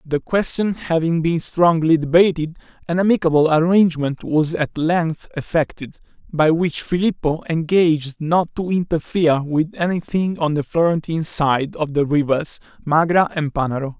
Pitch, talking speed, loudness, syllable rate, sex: 160 Hz, 135 wpm, -19 LUFS, 4.8 syllables/s, male